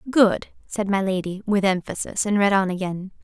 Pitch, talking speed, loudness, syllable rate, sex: 200 Hz, 185 wpm, -22 LUFS, 5.2 syllables/s, female